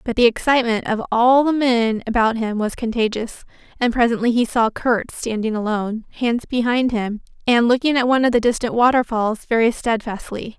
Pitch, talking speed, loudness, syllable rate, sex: 235 Hz, 175 wpm, -19 LUFS, 5.3 syllables/s, female